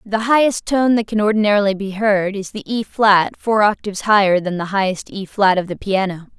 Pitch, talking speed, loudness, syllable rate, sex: 205 Hz, 195 wpm, -17 LUFS, 5.4 syllables/s, female